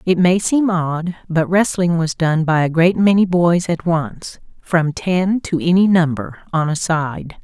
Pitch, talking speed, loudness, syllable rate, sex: 170 Hz, 180 wpm, -17 LUFS, 3.9 syllables/s, female